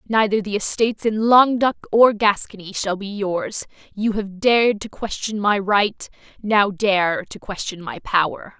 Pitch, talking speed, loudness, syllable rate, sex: 205 Hz, 155 wpm, -19 LUFS, 4.4 syllables/s, female